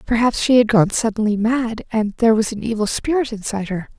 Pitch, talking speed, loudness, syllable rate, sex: 225 Hz, 210 wpm, -18 LUFS, 5.9 syllables/s, female